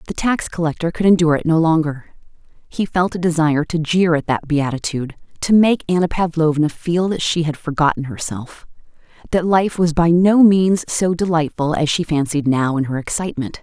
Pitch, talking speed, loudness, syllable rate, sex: 160 Hz, 185 wpm, -17 LUFS, 5.4 syllables/s, female